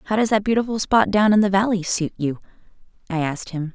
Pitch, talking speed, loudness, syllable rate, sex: 195 Hz, 225 wpm, -20 LUFS, 6.4 syllables/s, female